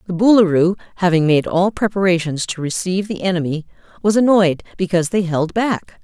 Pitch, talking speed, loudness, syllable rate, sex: 185 Hz, 160 wpm, -17 LUFS, 5.8 syllables/s, female